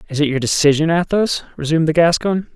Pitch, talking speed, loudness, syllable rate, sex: 160 Hz, 190 wpm, -16 LUFS, 6.2 syllables/s, male